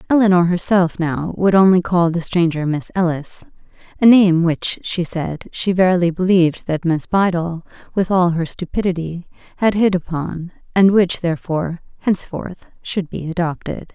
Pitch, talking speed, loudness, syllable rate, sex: 175 Hz, 150 wpm, -17 LUFS, 4.8 syllables/s, female